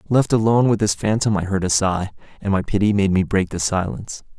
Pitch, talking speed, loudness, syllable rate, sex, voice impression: 100 Hz, 230 wpm, -19 LUFS, 6.1 syllables/s, male, masculine, slightly young, slightly adult-like, very thick, relaxed, slightly weak, slightly dark, soft, slightly muffled, very fluent, very cool, very intellectual, slightly refreshing, very sincere, calm, mature, very friendly, very reassuring, unique, elegant, slightly wild, sweet, kind, slightly modest